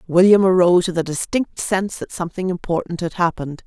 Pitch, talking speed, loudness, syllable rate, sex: 175 Hz, 180 wpm, -18 LUFS, 6.3 syllables/s, female